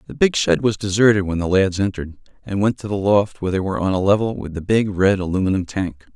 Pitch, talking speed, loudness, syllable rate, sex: 100 Hz, 255 wpm, -19 LUFS, 6.4 syllables/s, male